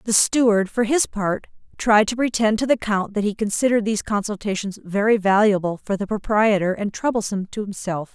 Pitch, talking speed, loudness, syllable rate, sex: 210 Hz, 185 wpm, -21 LUFS, 5.6 syllables/s, female